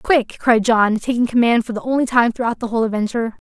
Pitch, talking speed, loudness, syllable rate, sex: 235 Hz, 225 wpm, -17 LUFS, 6.4 syllables/s, female